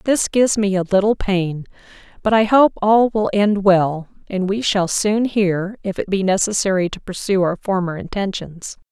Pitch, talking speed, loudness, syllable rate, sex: 195 Hz, 180 wpm, -18 LUFS, 4.6 syllables/s, female